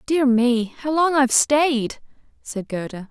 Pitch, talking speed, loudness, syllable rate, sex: 255 Hz, 175 wpm, -19 LUFS, 4.0 syllables/s, female